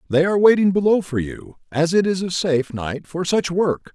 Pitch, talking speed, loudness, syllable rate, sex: 170 Hz, 230 wpm, -19 LUFS, 5.3 syllables/s, male